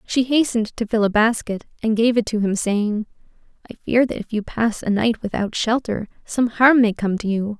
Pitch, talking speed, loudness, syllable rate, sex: 220 Hz, 220 wpm, -20 LUFS, 5.2 syllables/s, female